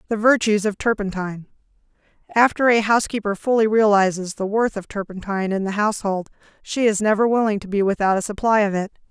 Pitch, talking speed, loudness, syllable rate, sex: 210 Hz, 170 wpm, -20 LUFS, 6.2 syllables/s, female